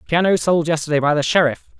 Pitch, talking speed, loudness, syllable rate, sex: 160 Hz, 200 wpm, -17 LUFS, 6.7 syllables/s, male